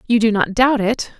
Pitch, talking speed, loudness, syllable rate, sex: 225 Hz, 250 wpm, -16 LUFS, 5.2 syllables/s, female